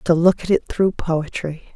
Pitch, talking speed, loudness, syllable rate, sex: 170 Hz, 205 wpm, -20 LUFS, 4.4 syllables/s, female